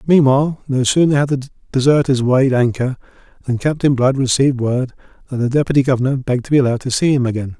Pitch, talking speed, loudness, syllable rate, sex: 130 Hz, 195 wpm, -16 LUFS, 6.7 syllables/s, male